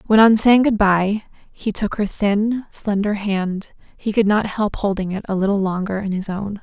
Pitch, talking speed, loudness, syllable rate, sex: 205 Hz, 210 wpm, -19 LUFS, 4.5 syllables/s, female